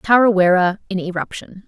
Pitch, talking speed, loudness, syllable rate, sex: 190 Hz, 110 wpm, -17 LUFS, 5.2 syllables/s, female